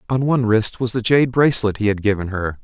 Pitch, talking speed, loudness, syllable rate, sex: 115 Hz, 250 wpm, -18 LUFS, 6.2 syllables/s, male